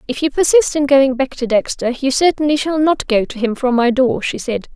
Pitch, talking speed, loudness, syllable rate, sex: 265 Hz, 255 wpm, -16 LUFS, 5.3 syllables/s, female